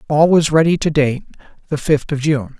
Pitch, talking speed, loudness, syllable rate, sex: 150 Hz, 210 wpm, -16 LUFS, 5.2 syllables/s, male